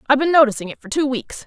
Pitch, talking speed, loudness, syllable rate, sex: 255 Hz, 285 wpm, -18 LUFS, 7.9 syllables/s, female